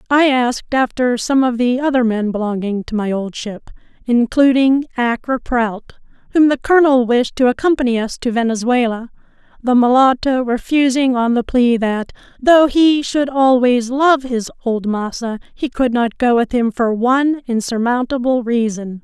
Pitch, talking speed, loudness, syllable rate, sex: 245 Hz, 160 wpm, -16 LUFS, 4.6 syllables/s, female